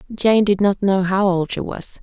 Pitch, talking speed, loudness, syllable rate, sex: 195 Hz, 235 wpm, -18 LUFS, 4.4 syllables/s, female